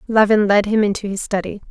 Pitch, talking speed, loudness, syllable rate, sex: 210 Hz, 210 wpm, -17 LUFS, 6.0 syllables/s, female